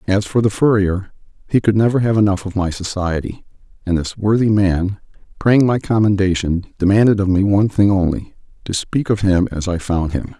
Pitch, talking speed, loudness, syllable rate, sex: 100 Hz, 185 wpm, -17 LUFS, 5.4 syllables/s, male